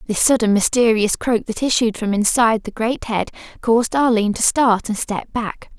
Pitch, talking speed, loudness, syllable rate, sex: 225 Hz, 185 wpm, -18 LUFS, 5.1 syllables/s, female